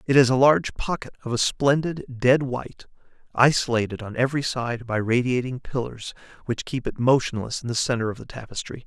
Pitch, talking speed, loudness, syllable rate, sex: 125 Hz, 185 wpm, -23 LUFS, 5.7 syllables/s, male